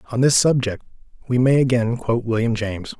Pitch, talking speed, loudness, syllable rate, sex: 120 Hz, 180 wpm, -19 LUFS, 6.1 syllables/s, male